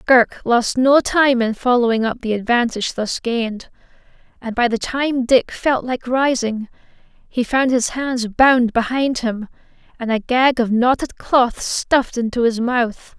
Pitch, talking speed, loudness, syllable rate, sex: 245 Hz, 165 wpm, -18 LUFS, 4.3 syllables/s, female